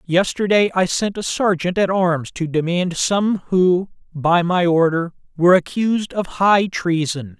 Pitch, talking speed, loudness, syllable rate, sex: 180 Hz, 155 wpm, -18 LUFS, 4.2 syllables/s, male